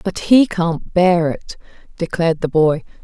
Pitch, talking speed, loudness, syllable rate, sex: 170 Hz, 160 wpm, -16 LUFS, 4.2 syllables/s, female